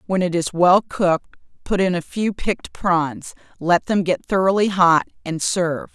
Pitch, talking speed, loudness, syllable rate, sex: 180 Hz, 180 wpm, -19 LUFS, 4.7 syllables/s, female